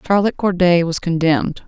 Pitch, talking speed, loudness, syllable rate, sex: 175 Hz, 145 wpm, -17 LUFS, 6.0 syllables/s, female